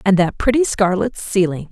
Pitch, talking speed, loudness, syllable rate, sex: 200 Hz, 175 wpm, -17 LUFS, 5.0 syllables/s, female